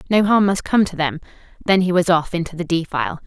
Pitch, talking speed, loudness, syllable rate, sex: 180 Hz, 240 wpm, -18 LUFS, 6.3 syllables/s, female